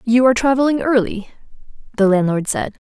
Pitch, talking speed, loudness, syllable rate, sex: 230 Hz, 145 wpm, -16 LUFS, 6.1 syllables/s, female